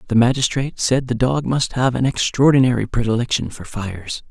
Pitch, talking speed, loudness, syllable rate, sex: 125 Hz, 165 wpm, -19 LUFS, 5.7 syllables/s, male